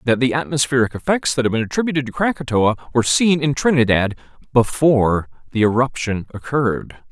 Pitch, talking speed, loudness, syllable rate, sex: 130 Hz, 150 wpm, -18 LUFS, 5.9 syllables/s, male